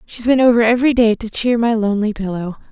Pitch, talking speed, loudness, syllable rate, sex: 225 Hz, 220 wpm, -16 LUFS, 6.5 syllables/s, female